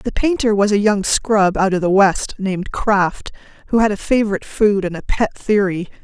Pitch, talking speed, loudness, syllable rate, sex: 200 Hz, 210 wpm, -17 LUFS, 5.1 syllables/s, female